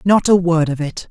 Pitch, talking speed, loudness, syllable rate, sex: 170 Hz, 270 wpm, -15 LUFS, 5.0 syllables/s, male